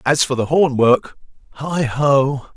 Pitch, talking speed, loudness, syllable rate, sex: 140 Hz, 165 wpm, -17 LUFS, 3.5 syllables/s, male